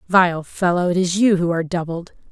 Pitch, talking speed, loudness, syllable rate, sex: 175 Hz, 180 wpm, -19 LUFS, 5.5 syllables/s, female